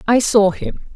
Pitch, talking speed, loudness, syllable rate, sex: 220 Hz, 190 wpm, -15 LUFS, 4.8 syllables/s, female